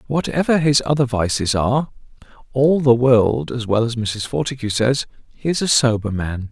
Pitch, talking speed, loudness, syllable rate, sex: 125 Hz, 175 wpm, -18 LUFS, 4.9 syllables/s, male